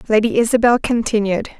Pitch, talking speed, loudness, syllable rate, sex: 225 Hz, 115 wpm, -16 LUFS, 6.2 syllables/s, female